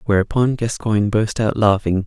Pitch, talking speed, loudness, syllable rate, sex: 105 Hz, 145 wpm, -18 LUFS, 5.2 syllables/s, male